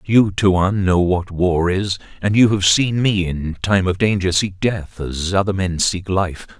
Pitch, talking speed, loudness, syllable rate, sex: 95 Hz, 200 wpm, -18 LUFS, 4.1 syllables/s, male